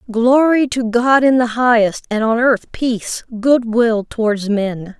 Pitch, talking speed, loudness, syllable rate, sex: 235 Hz, 170 wpm, -15 LUFS, 4.0 syllables/s, female